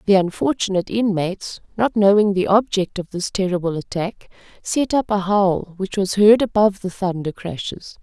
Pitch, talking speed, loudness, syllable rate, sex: 195 Hz, 165 wpm, -19 LUFS, 5.0 syllables/s, female